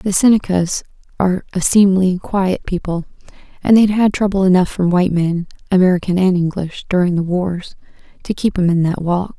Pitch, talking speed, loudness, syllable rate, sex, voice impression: 185 Hz, 160 wpm, -16 LUFS, 5.3 syllables/s, female, very feminine, young, very thin, relaxed, very weak, slightly bright, very soft, muffled, fluent, raspy, very cute, very intellectual, refreshing, very sincere, very calm, very friendly, very reassuring, unique, very elegant, slightly wild, very sweet, slightly lively, very kind, very modest, very light